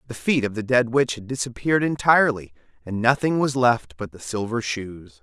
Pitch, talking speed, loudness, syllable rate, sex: 120 Hz, 195 wpm, -22 LUFS, 5.3 syllables/s, male